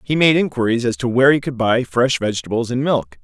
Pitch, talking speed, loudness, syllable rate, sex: 125 Hz, 240 wpm, -17 LUFS, 6.1 syllables/s, male